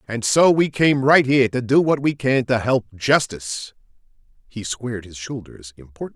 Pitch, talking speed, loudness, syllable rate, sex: 120 Hz, 185 wpm, -19 LUFS, 5.2 syllables/s, male